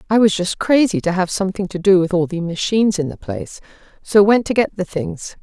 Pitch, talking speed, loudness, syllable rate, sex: 185 Hz, 245 wpm, -17 LUFS, 5.8 syllables/s, female